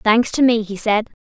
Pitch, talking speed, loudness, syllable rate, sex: 225 Hz, 245 wpm, -17 LUFS, 4.6 syllables/s, female